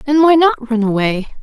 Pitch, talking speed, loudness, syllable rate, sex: 250 Hz, 210 wpm, -14 LUFS, 5.1 syllables/s, female